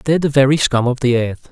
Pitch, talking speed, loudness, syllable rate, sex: 130 Hz, 280 wpm, -15 LUFS, 6.6 syllables/s, male